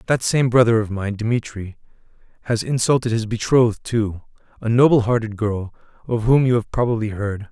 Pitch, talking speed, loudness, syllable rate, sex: 115 Hz, 170 wpm, -19 LUFS, 5.3 syllables/s, male